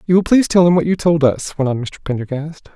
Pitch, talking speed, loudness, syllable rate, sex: 160 Hz, 285 wpm, -16 LUFS, 6.4 syllables/s, male